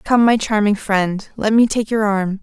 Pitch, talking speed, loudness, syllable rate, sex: 210 Hz, 225 wpm, -17 LUFS, 4.4 syllables/s, female